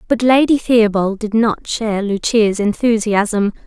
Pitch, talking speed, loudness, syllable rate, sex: 220 Hz, 130 wpm, -15 LUFS, 4.3 syllables/s, female